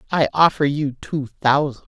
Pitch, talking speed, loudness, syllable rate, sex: 140 Hz, 155 wpm, -19 LUFS, 4.6 syllables/s, female